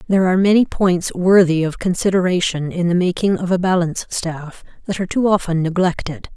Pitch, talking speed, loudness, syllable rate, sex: 180 Hz, 180 wpm, -17 LUFS, 5.7 syllables/s, female